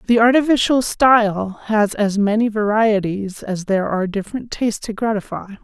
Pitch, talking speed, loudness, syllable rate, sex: 215 Hz, 150 wpm, -18 LUFS, 5.2 syllables/s, female